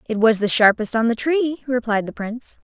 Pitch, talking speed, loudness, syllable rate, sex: 235 Hz, 220 wpm, -19 LUFS, 5.2 syllables/s, female